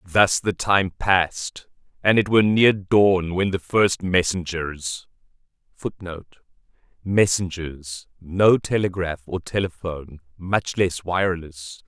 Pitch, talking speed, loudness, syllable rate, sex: 90 Hz, 110 wpm, -21 LUFS, 3.8 syllables/s, male